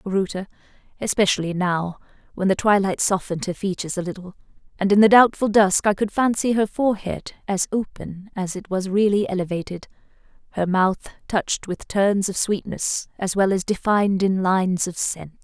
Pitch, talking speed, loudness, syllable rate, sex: 195 Hz, 165 wpm, -21 LUFS, 5.3 syllables/s, female